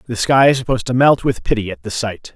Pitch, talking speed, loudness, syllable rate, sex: 120 Hz, 280 wpm, -16 LUFS, 6.5 syllables/s, male